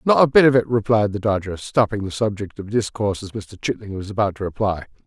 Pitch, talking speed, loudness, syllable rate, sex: 105 Hz, 235 wpm, -20 LUFS, 6.2 syllables/s, male